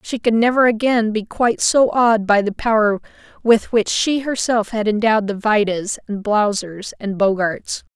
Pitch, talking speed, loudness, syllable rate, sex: 215 Hz, 175 wpm, -17 LUFS, 4.6 syllables/s, female